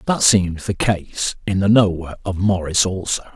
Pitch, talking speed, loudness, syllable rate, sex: 95 Hz, 180 wpm, -18 LUFS, 4.7 syllables/s, male